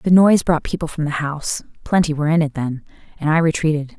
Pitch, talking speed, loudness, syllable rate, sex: 155 Hz, 195 wpm, -19 LUFS, 6.4 syllables/s, female